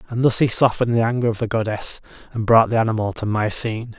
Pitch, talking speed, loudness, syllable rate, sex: 115 Hz, 225 wpm, -20 LUFS, 6.6 syllables/s, male